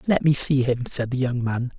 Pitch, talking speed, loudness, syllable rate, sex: 130 Hz, 270 wpm, -21 LUFS, 5.1 syllables/s, male